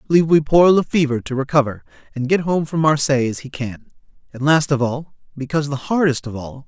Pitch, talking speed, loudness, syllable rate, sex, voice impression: 145 Hz, 200 wpm, -18 LUFS, 6.0 syllables/s, male, masculine, adult-like, fluent, slightly refreshing, sincere, slightly kind